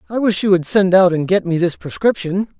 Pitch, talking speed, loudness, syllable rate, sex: 180 Hz, 255 wpm, -16 LUFS, 5.6 syllables/s, male